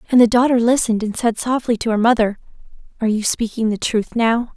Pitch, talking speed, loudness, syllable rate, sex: 230 Hz, 210 wpm, -17 LUFS, 6.2 syllables/s, female